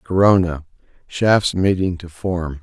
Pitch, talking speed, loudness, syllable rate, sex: 90 Hz, 115 wpm, -18 LUFS, 3.8 syllables/s, male